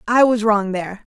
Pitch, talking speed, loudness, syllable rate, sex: 215 Hz, 215 wpm, -17 LUFS, 5.4 syllables/s, female